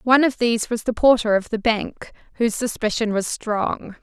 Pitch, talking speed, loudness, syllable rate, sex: 230 Hz, 195 wpm, -20 LUFS, 5.2 syllables/s, female